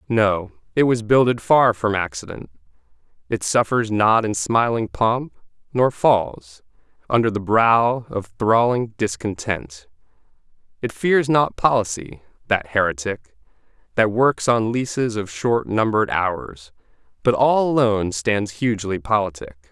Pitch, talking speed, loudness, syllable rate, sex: 110 Hz, 125 wpm, -20 LUFS, 4.2 syllables/s, male